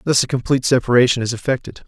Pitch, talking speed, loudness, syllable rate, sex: 125 Hz, 190 wpm, -17 LUFS, 7.5 syllables/s, male